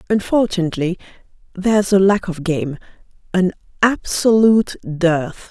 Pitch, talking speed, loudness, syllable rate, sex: 190 Hz, 100 wpm, -17 LUFS, 4.6 syllables/s, female